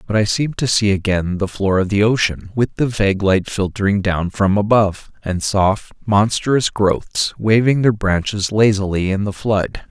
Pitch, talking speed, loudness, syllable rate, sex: 100 Hz, 180 wpm, -17 LUFS, 4.6 syllables/s, male